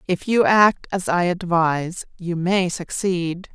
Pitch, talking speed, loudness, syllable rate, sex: 180 Hz, 150 wpm, -20 LUFS, 3.8 syllables/s, female